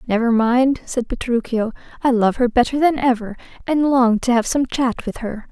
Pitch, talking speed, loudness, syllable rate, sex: 245 Hz, 195 wpm, -18 LUFS, 4.9 syllables/s, female